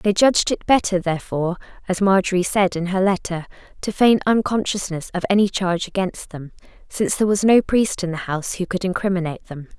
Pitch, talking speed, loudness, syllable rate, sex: 190 Hz, 190 wpm, -20 LUFS, 6.1 syllables/s, female